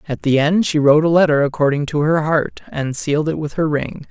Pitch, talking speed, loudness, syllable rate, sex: 150 Hz, 250 wpm, -17 LUFS, 5.7 syllables/s, male